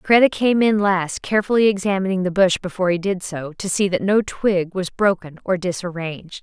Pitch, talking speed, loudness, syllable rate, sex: 190 Hz, 195 wpm, -19 LUFS, 5.4 syllables/s, female